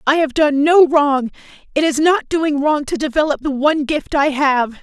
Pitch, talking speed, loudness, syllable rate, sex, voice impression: 290 Hz, 210 wpm, -16 LUFS, 4.7 syllables/s, female, feminine, adult-like, slightly powerful, slightly clear, intellectual, slightly sharp